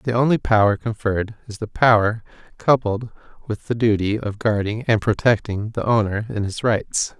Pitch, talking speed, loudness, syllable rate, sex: 110 Hz, 165 wpm, -20 LUFS, 4.9 syllables/s, male